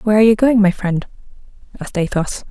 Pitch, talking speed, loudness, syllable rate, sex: 205 Hz, 190 wpm, -16 LUFS, 7.2 syllables/s, female